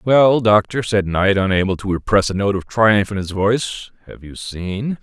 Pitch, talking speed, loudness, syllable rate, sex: 100 Hz, 205 wpm, -17 LUFS, 4.6 syllables/s, male